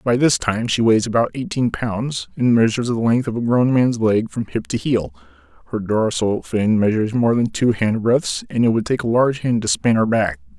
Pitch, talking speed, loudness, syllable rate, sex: 110 Hz, 230 wpm, -19 LUFS, 5.1 syllables/s, male